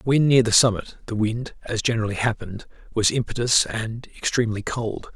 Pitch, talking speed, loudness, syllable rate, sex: 115 Hz, 165 wpm, -22 LUFS, 5.3 syllables/s, male